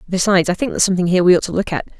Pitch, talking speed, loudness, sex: 180 Hz, 330 wpm, -16 LUFS, female